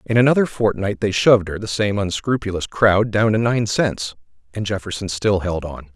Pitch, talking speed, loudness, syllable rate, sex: 105 Hz, 190 wpm, -19 LUFS, 5.2 syllables/s, male